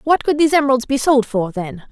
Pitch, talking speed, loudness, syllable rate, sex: 255 Hz, 250 wpm, -16 LUFS, 6.2 syllables/s, female